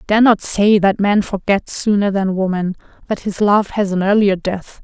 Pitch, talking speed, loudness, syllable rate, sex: 200 Hz, 200 wpm, -16 LUFS, 4.6 syllables/s, female